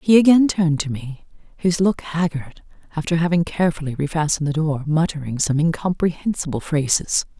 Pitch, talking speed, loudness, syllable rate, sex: 160 Hz, 145 wpm, -20 LUFS, 5.7 syllables/s, female